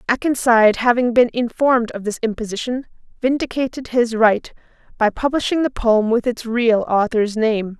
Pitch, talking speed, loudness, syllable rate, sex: 235 Hz, 145 wpm, -18 LUFS, 5.0 syllables/s, female